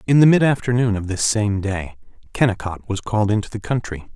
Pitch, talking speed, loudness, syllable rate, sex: 105 Hz, 200 wpm, -19 LUFS, 5.8 syllables/s, male